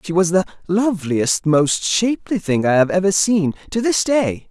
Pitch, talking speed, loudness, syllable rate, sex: 185 Hz, 175 wpm, -17 LUFS, 4.7 syllables/s, male